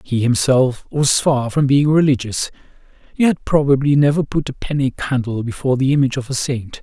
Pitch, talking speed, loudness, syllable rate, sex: 135 Hz, 185 wpm, -17 LUFS, 5.5 syllables/s, male